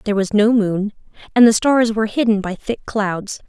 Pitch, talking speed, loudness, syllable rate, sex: 215 Hz, 205 wpm, -17 LUFS, 5.2 syllables/s, female